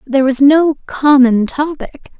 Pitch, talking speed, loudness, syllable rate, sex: 275 Hz, 135 wpm, -12 LUFS, 4.2 syllables/s, female